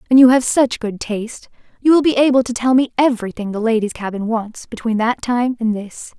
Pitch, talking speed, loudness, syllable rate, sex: 235 Hz, 225 wpm, -17 LUFS, 5.6 syllables/s, female